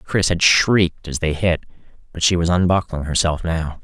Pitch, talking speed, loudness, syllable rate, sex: 85 Hz, 190 wpm, -18 LUFS, 5.0 syllables/s, male